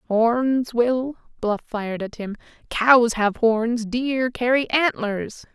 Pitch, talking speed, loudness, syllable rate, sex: 235 Hz, 130 wpm, -21 LUFS, 3.2 syllables/s, female